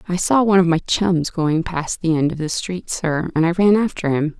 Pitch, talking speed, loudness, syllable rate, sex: 170 Hz, 260 wpm, -18 LUFS, 5.0 syllables/s, female